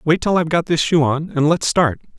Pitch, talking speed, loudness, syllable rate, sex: 155 Hz, 275 wpm, -17 LUFS, 5.9 syllables/s, male